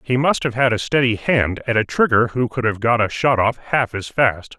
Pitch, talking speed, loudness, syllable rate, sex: 120 Hz, 260 wpm, -18 LUFS, 5.0 syllables/s, male